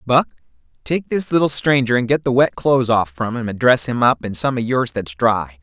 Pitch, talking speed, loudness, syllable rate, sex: 120 Hz, 245 wpm, -18 LUFS, 5.2 syllables/s, male